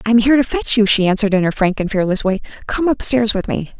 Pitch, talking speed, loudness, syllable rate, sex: 215 Hz, 285 wpm, -16 LUFS, 6.8 syllables/s, female